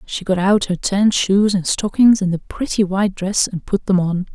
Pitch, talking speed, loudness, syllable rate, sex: 195 Hz, 235 wpm, -17 LUFS, 4.8 syllables/s, female